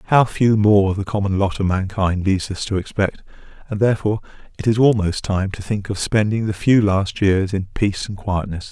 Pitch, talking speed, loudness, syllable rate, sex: 100 Hz, 205 wpm, -19 LUFS, 5.3 syllables/s, male